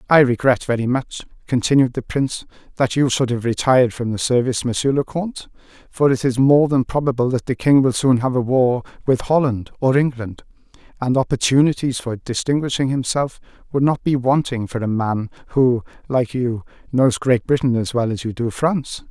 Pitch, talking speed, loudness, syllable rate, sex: 125 Hz, 190 wpm, -19 LUFS, 5.4 syllables/s, male